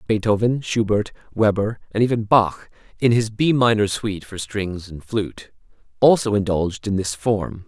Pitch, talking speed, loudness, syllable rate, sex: 105 Hz, 140 wpm, -20 LUFS, 4.8 syllables/s, male